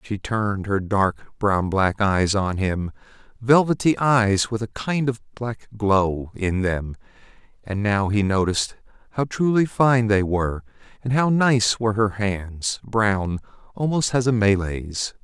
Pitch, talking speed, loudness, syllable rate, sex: 105 Hz, 140 wpm, -21 LUFS, 4.0 syllables/s, male